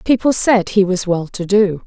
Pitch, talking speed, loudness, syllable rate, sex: 200 Hz, 225 wpm, -15 LUFS, 4.6 syllables/s, female